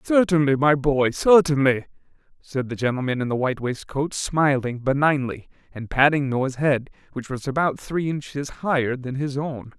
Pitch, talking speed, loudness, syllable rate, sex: 140 Hz, 160 wpm, -22 LUFS, 4.8 syllables/s, male